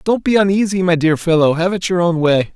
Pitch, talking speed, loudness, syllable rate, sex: 175 Hz, 260 wpm, -15 LUFS, 5.7 syllables/s, male